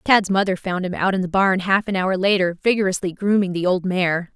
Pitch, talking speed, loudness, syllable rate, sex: 190 Hz, 235 wpm, -20 LUFS, 5.5 syllables/s, female